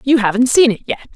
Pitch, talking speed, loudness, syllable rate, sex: 245 Hz, 260 wpm, -14 LUFS, 7.0 syllables/s, female